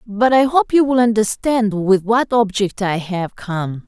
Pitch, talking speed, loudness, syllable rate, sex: 215 Hz, 185 wpm, -17 LUFS, 4.0 syllables/s, female